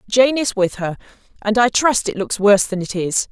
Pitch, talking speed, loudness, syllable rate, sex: 215 Hz, 235 wpm, -17 LUFS, 5.3 syllables/s, female